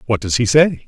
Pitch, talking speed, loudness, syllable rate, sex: 120 Hz, 275 wpm, -15 LUFS, 5.6 syllables/s, male